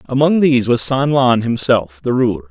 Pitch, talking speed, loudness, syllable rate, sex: 125 Hz, 190 wpm, -15 LUFS, 5.0 syllables/s, male